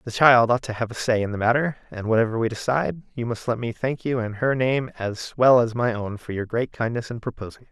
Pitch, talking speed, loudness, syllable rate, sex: 120 Hz, 270 wpm, -23 LUFS, 5.9 syllables/s, male